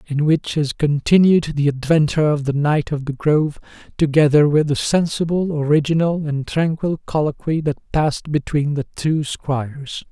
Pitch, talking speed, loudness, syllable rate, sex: 150 Hz, 155 wpm, -18 LUFS, 4.8 syllables/s, male